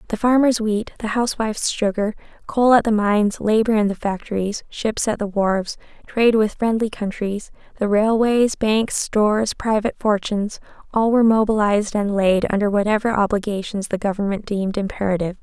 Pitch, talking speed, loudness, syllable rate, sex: 210 Hz, 150 wpm, -20 LUFS, 5.5 syllables/s, female